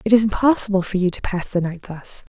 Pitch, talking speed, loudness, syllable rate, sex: 195 Hz, 255 wpm, -20 LUFS, 6.0 syllables/s, female